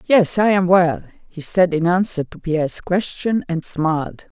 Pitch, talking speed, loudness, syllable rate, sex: 175 Hz, 180 wpm, -18 LUFS, 4.3 syllables/s, female